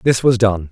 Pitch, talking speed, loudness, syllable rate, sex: 110 Hz, 250 wpm, -15 LUFS, 4.9 syllables/s, male